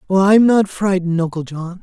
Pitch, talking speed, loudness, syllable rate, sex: 185 Hz, 165 wpm, -15 LUFS, 4.9 syllables/s, male